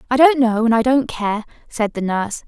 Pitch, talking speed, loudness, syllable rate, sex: 235 Hz, 240 wpm, -17 LUFS, 5.5 syllables/s, female